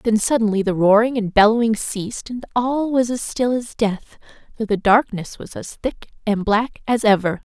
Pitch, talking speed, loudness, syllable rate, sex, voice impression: 220 Hz, 190 wpm, -19 LUFS, 4.8 syllables/s, female, feminine, slightly young, slightly adult-like, tensed, bright, clear, fluent, slightly cute, friendly, unique, slightly strict, slightly intense, slightly sharp